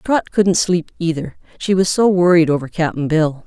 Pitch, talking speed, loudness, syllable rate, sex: 170 Hz, 190 wpm, -16 LUFS, 4.5 syllables/s, female